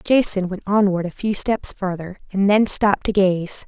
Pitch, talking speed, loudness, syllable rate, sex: 195 Hz, 195 wpm, -19 LUFS, 4.6 syllables/s, female